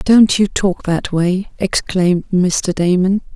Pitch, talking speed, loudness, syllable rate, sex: 185 Hz, 145 wpm, -15 LUFS, 3.7 syllables/s, female